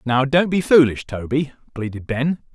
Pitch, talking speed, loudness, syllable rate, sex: 135 Hz, 165 wpm, -19 LUFS, 4.7 syllables/s, male